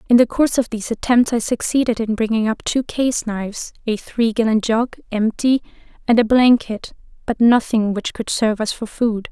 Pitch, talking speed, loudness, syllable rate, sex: 230 Hz, 195 wpm, -18 LUFS, 5.2 syllables/s, female